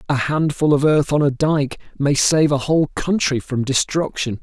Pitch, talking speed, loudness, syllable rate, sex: 145 Hz, 190 wpm, -18 LUFS, 4.7 syllables/s, male